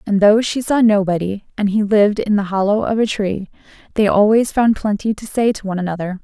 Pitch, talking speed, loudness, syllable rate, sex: 205 Hz, 220 wpm, -17 LUFS, 5.8 syllables/s, female